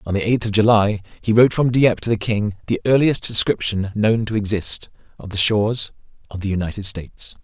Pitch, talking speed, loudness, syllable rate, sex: 105 Hz, 200 wpm, -19 LUFS, 5.7 syllables/s, male